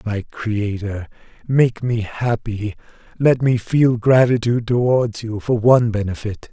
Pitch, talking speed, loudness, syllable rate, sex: 115 Hz, 130 wpm, -18 LUFS, 4.2 syllables/s, male